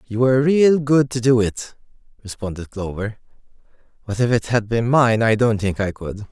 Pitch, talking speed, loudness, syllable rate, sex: 115 Hz, 190 wpm, -19 LUFS, 5.0 syllables/s, male